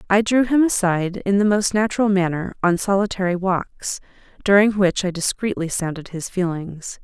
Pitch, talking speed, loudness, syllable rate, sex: 190 Hz, 160 wpm, -20 LUFS, 5.1 syllables/s, female